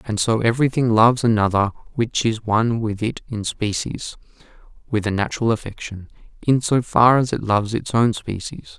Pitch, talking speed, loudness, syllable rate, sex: 115 Hz, 170 wpm, -20 LUFS, 5.3 syllables/s, male